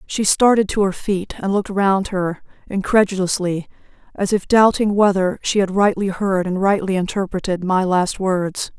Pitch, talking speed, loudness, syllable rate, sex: 190 Hz, 165 wpm, -18 LUFS, 4.7 syllables/s, female